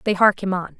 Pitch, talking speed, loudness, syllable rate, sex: 190 Hz, 300 wpm, -19 LUFS, 6.0 syllables/s, female